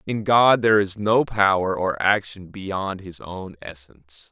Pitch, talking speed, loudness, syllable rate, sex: 95 Hz, 165 wpm, -20 LUFS, 4.2 syllables/s, male